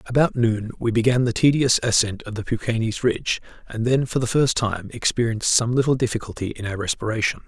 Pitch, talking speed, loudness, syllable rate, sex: 115 Hz, 195 wpm, -21 LUFS, 6.0 syllables/s, male